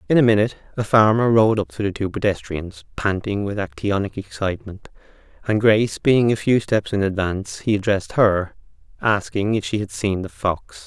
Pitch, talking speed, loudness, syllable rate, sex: 105 Hz, 180 wpm, -20 LUFS, 5.3 syllables/s, male